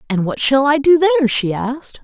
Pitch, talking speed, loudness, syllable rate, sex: 255 Hz, 235 wpm, -15 LUFS, 5.5 syllables/s, female